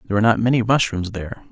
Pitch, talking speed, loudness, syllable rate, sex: 110 Hz, 240 wpm, -19 LUFS, 8.1 syllables/s, male